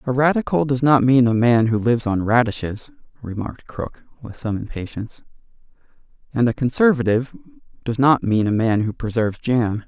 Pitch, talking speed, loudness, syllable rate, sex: 120 Hz, 165 wpm, -19 LUFS, 5.5 syllables/s, male